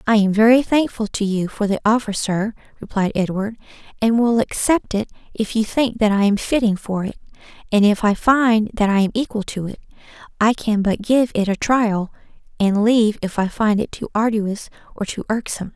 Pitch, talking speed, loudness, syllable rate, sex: 215 Hz, 200 wpm, -19 LUFS, 5.2 syllables/s, female